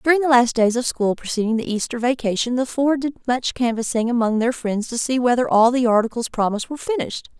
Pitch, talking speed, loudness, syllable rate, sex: 240 Hz, 220 wpm, -20 LUFS, 6.2 syllables/s, female